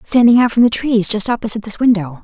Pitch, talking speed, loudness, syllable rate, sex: 220 Hz, 240 wpm, -14 LUFS, 6.6 syllables/s, female